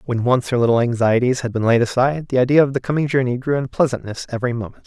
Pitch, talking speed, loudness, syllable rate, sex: 125 Hz, 245 wpm, -18 LUFS, 7.1 syllables/s, male